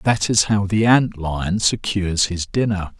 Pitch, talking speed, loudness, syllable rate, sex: 100 Hz, 180 wpm, -19 LUFS, 4.1 syllables/s, male